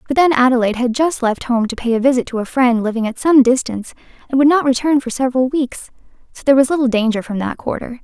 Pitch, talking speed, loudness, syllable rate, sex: 255 Hz, 245 wpm, -16 LUFS, 6.6 syllables/s, female